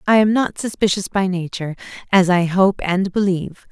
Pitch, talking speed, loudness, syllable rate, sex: 190 Hz, 180 wpm, -18 LUFS, 5.4 syllables/s, female